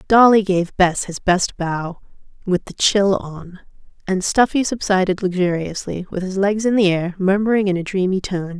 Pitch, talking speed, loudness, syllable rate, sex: 190 Hz, 175 wpm, -18 LUFS, 4.7 syllables/s, female